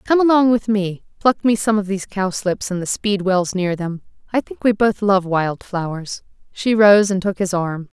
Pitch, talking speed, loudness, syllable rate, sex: 200 Hz, 210 wpm, -18 LUFS, 4.7 syllables/s, female